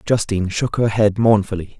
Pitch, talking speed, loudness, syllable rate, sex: 105 Hz, 165 wpm, -18 LUFS, 5.3 syllables/s, male